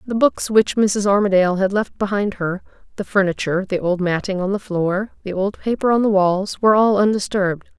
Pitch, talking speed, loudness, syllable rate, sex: 200 Hz, 200 wpm, -18 LUFS, 5.5 syllables/s, female